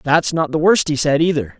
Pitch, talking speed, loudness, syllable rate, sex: 155 Hz, 265 wpm, -16 LUFS, 5.4 syllables/s, male